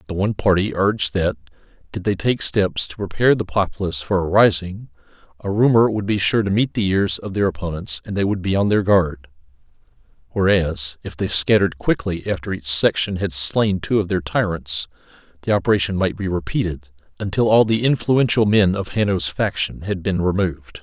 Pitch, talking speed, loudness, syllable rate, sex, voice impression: 95 Hz, 185 wpm, -19 LUFS, 5.5 syllables/s, male, very masculine, very adult-like, middle-aged, very thick, tensed, very powerful, slightly bright, slightly hard, slightly muffled, fluent, very cool, very intellectual, sincere, very calm, very mature, very friendly, very reassuring, slightly unique, very elegant, slightly wild, very sweet, slightly lively, very kind, slightly modest